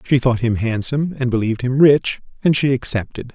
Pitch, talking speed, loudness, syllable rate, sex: 125 Hz, 200 wpm, -18 LUFS, 5.7 syllables/s, male